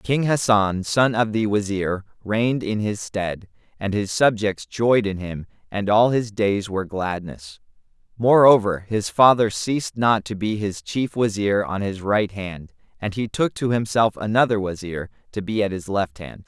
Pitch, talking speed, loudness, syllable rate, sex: 105 Hz, 180 wpm, -21 LUFS, 4.5 syllables/s, male